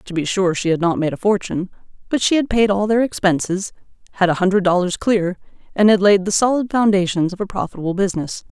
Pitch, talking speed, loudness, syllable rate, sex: 190 Hz, 215 wpm, -18 LUFS, 6.3 syllables/s, female